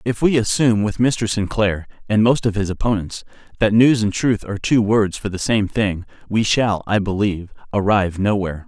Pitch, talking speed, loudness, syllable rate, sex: 105 Hz, 195 wpm, -18 LUFS, 5.3 syllables/s, male